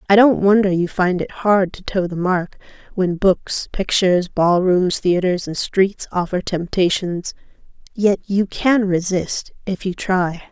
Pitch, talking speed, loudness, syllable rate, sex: 185 Hz, 160 wpm, -18 LUFS, 4.0 syllables/s, female